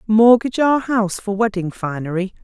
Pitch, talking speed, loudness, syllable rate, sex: 210 Hz, 150 wpm, -18 LUFS, 5.4 syllables/s, female